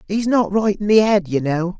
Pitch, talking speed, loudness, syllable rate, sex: 195 Hz, 270 wpm, -17 LUFS, 4.9 syllables/s, male